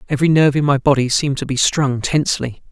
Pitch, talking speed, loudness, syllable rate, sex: 135 Hz, 220 wpm, -16 LUFS, 6.9 syllables/s, male